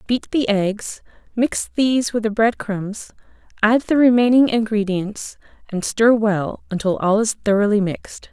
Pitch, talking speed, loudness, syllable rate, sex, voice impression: 220 Hz, 150 wpm, -19 LUFS, 4.4 syllables/s, female, feminine, adult-like, tensed, slightly powerful, soft, raspy, intellectual, calm, friendly, reassuring, elegant, slightly lively, kind